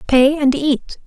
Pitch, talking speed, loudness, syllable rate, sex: 275 Hz, 170 wpm, -16 LUFS, 3.5 syllables/s, female